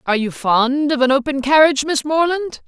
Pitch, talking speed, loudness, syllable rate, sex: 280 Hz, 200 wpm, -16 LUFS, 5.6 syllables/s, female